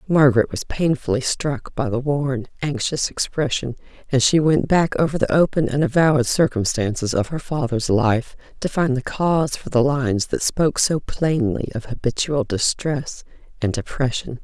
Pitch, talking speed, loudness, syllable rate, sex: 135 Hz, 160 wpm, -20 LUFS, 4.8 syllables/s, female